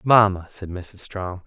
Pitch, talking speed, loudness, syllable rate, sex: 95 Hz, 165 wpm, -22 LUFS, 3.8 syllables/s, male